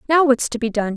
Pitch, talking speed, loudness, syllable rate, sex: 250 Hz, 315 wpm, -18 LUFS, 6.5 syllables/s, female